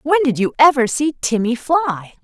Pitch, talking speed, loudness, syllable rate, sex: 265 Hz, 190 wpm, -16 LUFS, 4.6 syllables/s, female